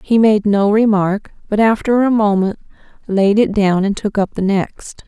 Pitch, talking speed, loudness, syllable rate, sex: 205 Hz, 190 wpm, -15 LUFS, 4.4 syllables/s, female